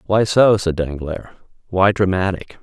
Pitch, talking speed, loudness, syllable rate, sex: 95 Hz, 135 wpm, -17 LUFS, 4.4 syllables/s, male